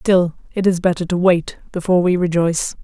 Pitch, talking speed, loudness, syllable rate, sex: 175 Hz, 190 wpm, -17 LUFS, 5.7 syllables/s, female